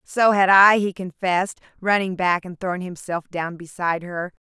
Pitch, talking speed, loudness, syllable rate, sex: 185 Hz, 175 wpm, -21 LUFS, 4.9 syllables/s, female